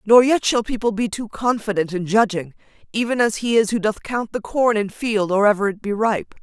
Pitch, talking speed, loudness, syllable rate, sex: 215 Hz, 235 wpm, -20 LUFS, 5.3 syllables/s, female